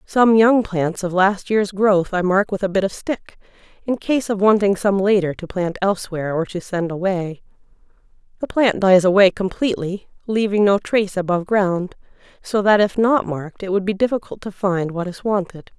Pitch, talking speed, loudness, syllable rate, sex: 195 Hz, 195 wpm, -19 LUFS, 5.1 syllables/s, female